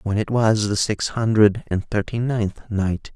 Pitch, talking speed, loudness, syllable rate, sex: 105 Hz, 190 wpm, -21 LUFS, 4.1 syllables/s, male